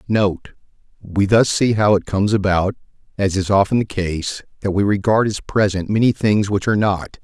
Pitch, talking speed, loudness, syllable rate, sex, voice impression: 100 Hz, 180 wpm, -18 LUFS, 5.1 syllables/s, male, very masculine, very adult-like, very middle-aged, very thick, very tensed, powerful, slightly dark, slightly soft, slightly muffled, very fluent, slightly raspy, cool, very intellectual, very sincere, very calm, very mature, friendly, very reassuring, unique, wild, slightly strict